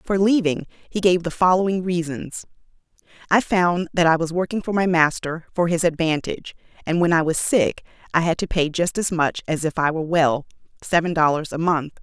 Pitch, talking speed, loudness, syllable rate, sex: 170 Hz, 195 wpm, -21 LUFS, 5.4 syllables/s, female